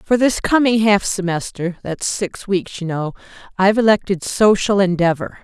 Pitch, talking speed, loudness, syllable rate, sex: 195 Hz, 135 wpm, -17 LUFS, 4.8 syllables/s, female